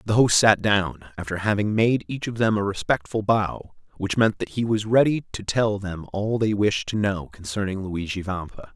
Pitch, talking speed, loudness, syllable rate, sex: 100 Hz, 205 wpm, -23 LUFS, 4.8 syllables/s, male